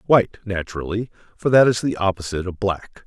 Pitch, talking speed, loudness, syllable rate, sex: 100 Hz, 175 wpm, -21 LUFS, 5.9 syllables/s, male